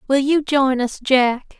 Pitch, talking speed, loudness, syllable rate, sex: 265 Hz, 190 wpm, -18 LUFS, 3.7 syllables/s, female